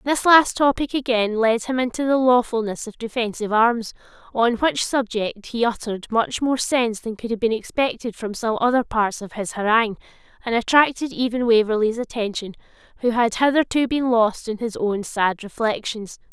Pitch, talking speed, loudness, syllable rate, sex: 230 Hz, 175 wpm, -21 LUFS, 5.1 syllables/s, female